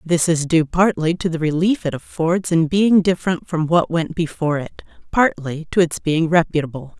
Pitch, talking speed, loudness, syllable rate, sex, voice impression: 165 Hz, 190 wpm, -18 LUFS, 5.0 syllables/s, female, feminine, middle-aged, tensed, powerful, clear, slightly fluent, intellectual, elegant, lively, slightly strict, slightly sharp